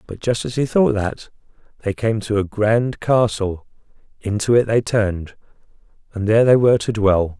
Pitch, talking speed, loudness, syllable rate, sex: 110 Hz, 180 wpm, -18 LUFS, 5.0 syllables/s, male